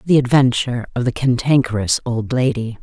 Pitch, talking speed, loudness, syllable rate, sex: 125 Hz, 150 wpm, -17 LUFS, 5.5 syllables/s, female